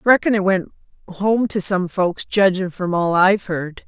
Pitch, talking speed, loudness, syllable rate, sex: 190 Hz, 185 wpm, -18 LUFS, 4.6 syllables/s, female